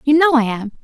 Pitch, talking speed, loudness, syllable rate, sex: 265 Hz, 290 wpm, -15 LUFS, 6.1 syllables/s, female